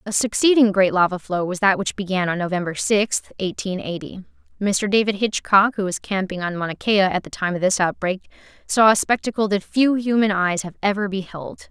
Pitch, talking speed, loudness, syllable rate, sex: 195 Hz, 200 wpm, -20 LUFS, 5.4 syllables/s, female